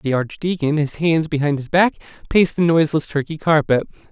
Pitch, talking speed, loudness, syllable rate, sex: 155 Hz, 175 wpm, -18 LUFS, 5.8 syllables/s, male